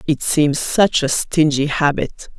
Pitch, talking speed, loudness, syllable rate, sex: 150 Hz, 150 wpm, -17 LUFS, 3.7 syllables/s, female